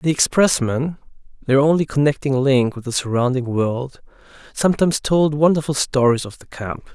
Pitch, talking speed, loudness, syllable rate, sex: 140 Hz, 130 wpm, -18 LUFS, 5.0 syllables/s, male